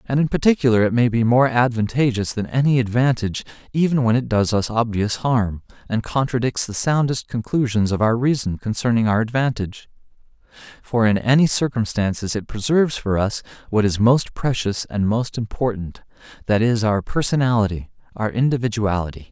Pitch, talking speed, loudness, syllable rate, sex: 115 Hz, 150 wpm, -20 LUFS, 5.4 syllables/s, male